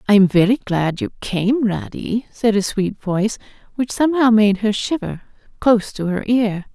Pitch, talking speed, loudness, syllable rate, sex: 210 Hz, 170 wpm, -18 LUFS, 4.7 syllables/s, female